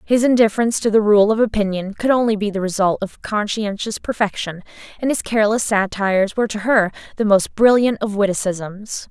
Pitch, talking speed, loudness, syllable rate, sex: 210 Hz, 180 wpm, -18 LUFS, 5.5 syllables/s, female